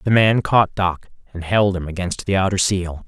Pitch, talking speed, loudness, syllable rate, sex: 95 Hz, 215 wpm, -19 LUFS, 4.8 syllables/s, male